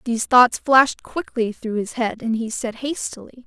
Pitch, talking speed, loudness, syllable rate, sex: 235 Hz, 190 wpm, -20 LUFS, 4.8 syllables/s, female